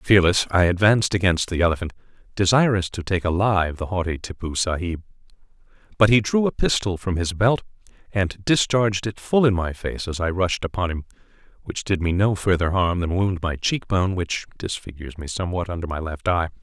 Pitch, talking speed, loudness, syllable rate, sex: 95 Hz, 190 wpm, -22 LUFS, 5.6 syllables/s, male